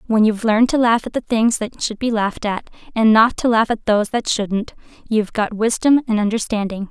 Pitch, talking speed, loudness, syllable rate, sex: 220 Hz, 225 wpm, -18 LUFS, 5.7 syllables/s, female